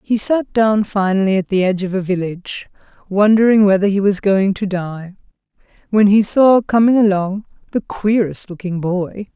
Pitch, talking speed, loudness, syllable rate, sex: 200 Hz, 165 wpm, -16 LUFS, 4.9 syllables/s, female